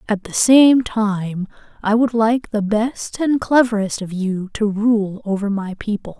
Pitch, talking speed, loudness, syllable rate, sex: 215 Hz, 175 wpm, -18 LUFS, 3.9 syllables/s, female